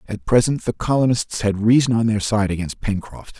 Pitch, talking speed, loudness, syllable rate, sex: 110 Hz, 195 wpm, -19 LUFS, 5.3 syllables/s, male